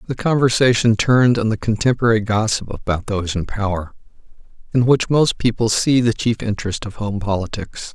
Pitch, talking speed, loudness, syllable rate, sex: 110 Hz, 165 wpm, -18 LUFS, 5.6 syllables/s, male